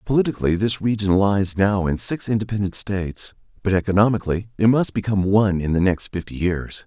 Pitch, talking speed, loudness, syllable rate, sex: 100 Hz, 175 wpm, -21 LUFS, 6.0 syllables/s, male